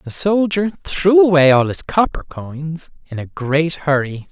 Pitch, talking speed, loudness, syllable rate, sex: 160 Hz, 165 wpm, -16 LUFS, 4.0 syllables/s, male